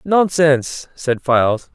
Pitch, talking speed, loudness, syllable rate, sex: 140 Hz, 105 wpm, -16 LUFS, 3.8 syllables/s, male